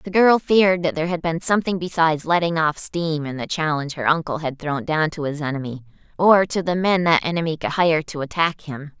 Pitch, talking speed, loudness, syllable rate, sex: 160 Hz, 225 wpm, -20 LUFS, 5.7 syllables/s, female